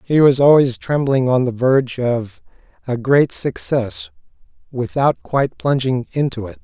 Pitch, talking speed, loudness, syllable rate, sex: 130 Hz, 145 wpm, -17 LUFS, 4.4 syllables/s, male